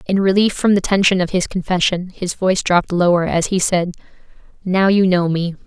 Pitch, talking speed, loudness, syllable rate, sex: 185 Hz, 200 wpm, -16 LUFS, 5.5 syllables/s, female